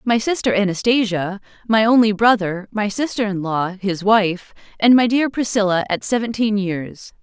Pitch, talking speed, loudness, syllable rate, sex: 210 Hz, 160 wpm, -18 LUFS, 4.6 syllables/s, female